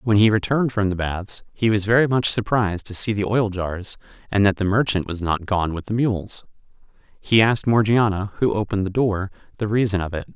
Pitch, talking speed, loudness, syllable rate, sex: 105 Hz, 215 wpm, -21 LUFS, 5.6 syllables/s, male